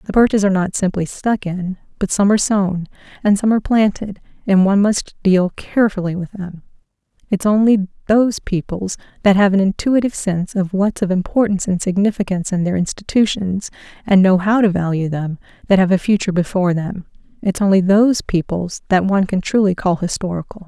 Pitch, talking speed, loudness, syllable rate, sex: 195 Hz, 175 wpm, -17 LUFS, 5.9 syllables/s, female